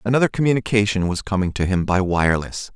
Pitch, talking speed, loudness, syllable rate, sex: 100 Hz, 175 wpm, -20 LUFS, 6.4 syllables/s, male